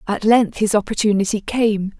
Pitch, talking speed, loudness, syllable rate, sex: 210 Hz, 150 wpm, -18 LUFS, 5.0 syllables/s, female